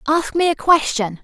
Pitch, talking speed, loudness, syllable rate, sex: 295 Hz, 195 wpm, -17 LUFS, 4.7 syllables/s, female